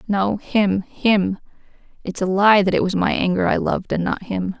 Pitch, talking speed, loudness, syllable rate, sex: 195 Hz, 210 wpm, -19 LUFS, 4.7 syllables/s, female